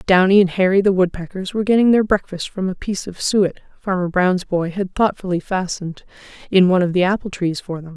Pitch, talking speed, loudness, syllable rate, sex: 185 Hz, 210 wpm, -18 LUFS, 6.0 syllables/s, female